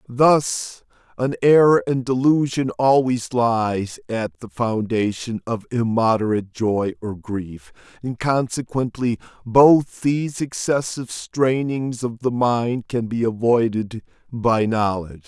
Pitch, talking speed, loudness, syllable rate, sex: 120 Hz, 115 wpm, -20 LUFS, 3.8 syllables/s, male